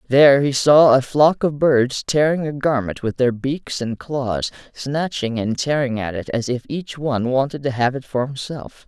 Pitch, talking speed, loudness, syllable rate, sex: 135 Hz, 205 wpm, -19 LUFS, 4.5 syllables/s, male